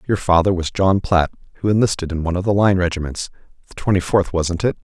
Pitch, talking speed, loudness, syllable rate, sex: 90 Hz, 210 wpm, -19 LUFS, 6.3 syllables/s, male